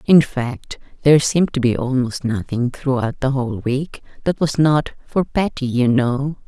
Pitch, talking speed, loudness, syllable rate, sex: 135 Hz, 175 wpm, -19 LUFS, 4.6 syllables/s, female